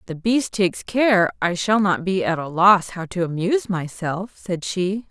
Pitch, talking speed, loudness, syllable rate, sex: 190 Hz, 200 wpm, -20 LUFS, 4.4 syllables/s, female